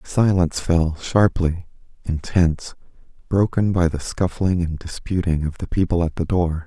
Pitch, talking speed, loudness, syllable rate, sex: 85 Hz, 145 wpm, -21 LUFS, 4.6 syllables/s, male